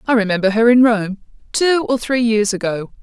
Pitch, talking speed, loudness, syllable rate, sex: 225 Hz, 200 wpm, -16 LUFS, 5.2 syllables/s, female